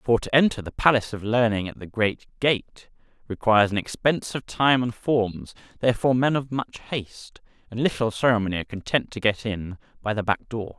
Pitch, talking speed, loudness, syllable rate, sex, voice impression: 115 Hz, 195 wpm, -24 LUFS, 5.7 syllables/s, male, masculine, adult-like, fluent, slightly refreshing, slightly unique